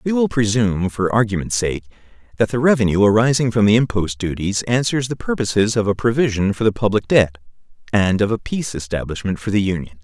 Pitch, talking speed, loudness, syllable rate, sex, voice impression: 110 Hz, 190 wpm, -18 LUFS, 6.0 syllables/s, male, masculine, adult-like, tensed, bright, clear, fluent, cool, intellectual, friendly, elegant, slightly wild, lively, slightly light